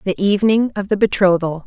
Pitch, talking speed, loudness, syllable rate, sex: 195 Hz, 180 wpm, -16 LUFS, 6.0 syllables/s, female